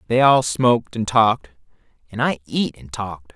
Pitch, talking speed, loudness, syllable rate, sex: 110 Hz, 180 wpm, -19 LUFS, 5.2 syllables/s, male